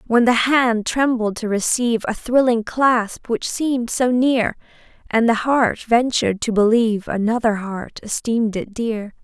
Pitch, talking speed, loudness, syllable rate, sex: 230 Hz, 155 wpm, -19 LUFS, 4.4 syllables/s, female